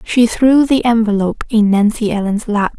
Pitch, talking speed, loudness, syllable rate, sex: 220 Hz, 170 wpm, -14 LUFS, 4.9 syllables/s, female